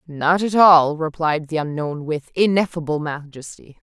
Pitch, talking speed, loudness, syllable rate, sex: 160 Hz, 140 wpm, -19 LUFS, 4.4 syllables/s, female